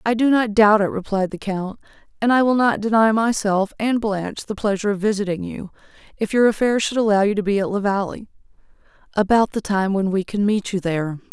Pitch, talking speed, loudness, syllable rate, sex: 205 Hz, 215 wpm, -20 LUFS, 5.8 syllables/s, female